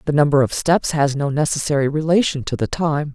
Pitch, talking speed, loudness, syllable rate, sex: 145 Hz, 210 wpm, -18 LUFS, 5.7 syllables/s, female